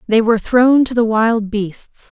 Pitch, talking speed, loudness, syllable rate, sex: 225 Hz, 190 wpm, -14 LUFS, 4.1 syllables/s, female